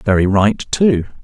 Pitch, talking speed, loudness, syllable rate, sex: 110 Hz, 145 wpm, -15 LUFS, 3.8 syllables/s, male